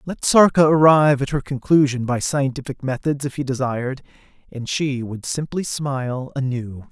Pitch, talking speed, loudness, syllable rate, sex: 135 Hz, 155 wpm, -20 LUFS, 5.0 syllables/s, male